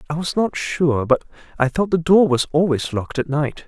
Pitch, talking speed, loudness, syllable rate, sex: 155 Hz, 230 wpm, -19 LUFS, 5.2 syllables/s, male